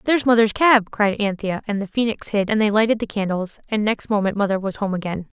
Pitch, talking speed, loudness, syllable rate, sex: 210 Hz, 235 wpm, -20 LUFS, 6.0 syllables/s, female